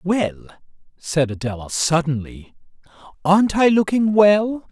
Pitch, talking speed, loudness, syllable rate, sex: 170 Hz, 100 wpm, -18 LUFS, 4.2 syllables/s, male